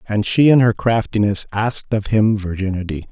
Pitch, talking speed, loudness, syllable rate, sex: 105 Hz, 175 wpm, -17 LUFS, 5.1 syllables/s, male